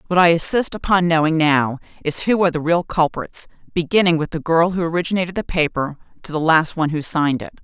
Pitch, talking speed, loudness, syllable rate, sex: 165 Hz, 210 wpm, -19 LUFS, 6.2 syllables/s, female